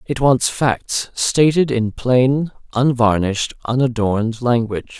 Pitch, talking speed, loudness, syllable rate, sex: 120 Hz, 110 wpm, -17 LUFS, 4.0 syllables/s, male